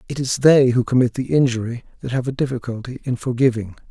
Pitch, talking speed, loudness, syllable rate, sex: 125 Hz, 200 wpm, -19 LUFS, 6.1 syllables/s, male